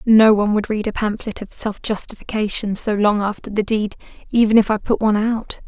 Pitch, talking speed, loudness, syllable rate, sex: 210 Hz, 210 wpm, -19 LUFS, 5.6 syllables/s, female